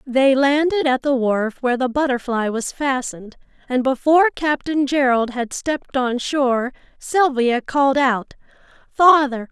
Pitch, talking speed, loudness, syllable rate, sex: 265 Hz, 140 wpm, -18 LUFS, 4.5 syllables/s, female